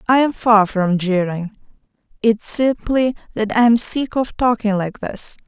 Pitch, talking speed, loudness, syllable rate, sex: 220 Hz, 155 wpm, -18 LUFS, 3.9 syllables/s, female